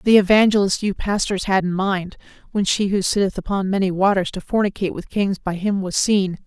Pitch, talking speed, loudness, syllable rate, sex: 195 Hz, 205 wpm, -20 LUFS, 5.6 syllables/s, female